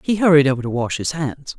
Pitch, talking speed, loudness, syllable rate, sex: 140 Hz, 265 wpm, -18 LUFS, 6.0 syllables/s, female